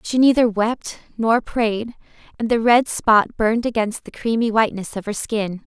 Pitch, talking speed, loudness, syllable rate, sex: 225 Hz, 175 wpm, -19 LUFS, 4.6 syllables/s, female